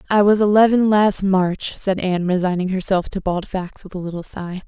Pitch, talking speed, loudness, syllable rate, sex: 190 Hz, 205 wpm, -19 LUFS, 5.2 syllables/s, female